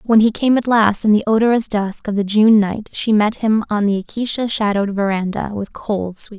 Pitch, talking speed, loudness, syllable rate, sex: 210 Hz, 225 wpm, -17 LUFS, 5.4 syllables/s, female